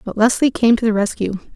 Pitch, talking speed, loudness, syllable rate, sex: 225 Hz, 230 wpm, -17 LUFS, 5.9 syllables/s, female